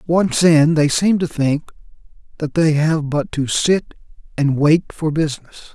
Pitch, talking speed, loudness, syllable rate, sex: 155 Hz, 165 wpm, -17 LUFS, 4.2 syllables/s, male